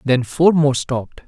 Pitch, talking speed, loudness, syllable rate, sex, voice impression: 140 Hz, 190 wpm, -17 LUFS, 4.4 syllables/s, male, slightly masculine, adult-like, slightly halting, calm, slightly unique